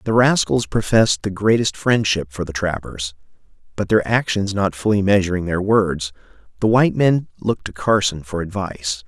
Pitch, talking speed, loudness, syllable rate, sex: 100 Hz, 165 wpm, -19 LUFS, 5.2 syllables/s, male